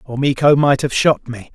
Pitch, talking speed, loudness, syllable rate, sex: 135 Hz, 235 wpm, -15 LUFS, 4.9 syllables/s, male